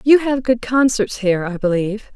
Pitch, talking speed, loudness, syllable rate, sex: 225 Hz, 195 wpm, -17 LUFS, 5.4 syllables/s, female